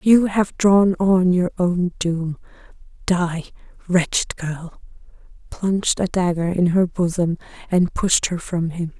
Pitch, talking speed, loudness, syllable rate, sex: 180 Hz, 135 wpm, -20 LUFS, 3.8 syllables/s, female